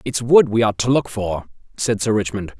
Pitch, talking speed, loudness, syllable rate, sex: 110 Hz, 230 wpm, -18 LUFS, 5.2 syllables/s, male